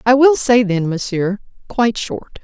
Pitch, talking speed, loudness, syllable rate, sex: 220 Hz, 175 wpm, -16 LUFS, 4.4 syllables/s, female